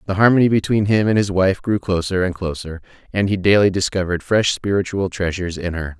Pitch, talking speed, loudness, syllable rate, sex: 95 Hz, 200 wpm, -18 LUFS, 6.0 syllables/s, male